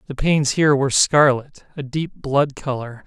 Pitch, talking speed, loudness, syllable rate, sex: 140 Hz, 155 wpm, -19 LUFS, 5.0 syllables/s, male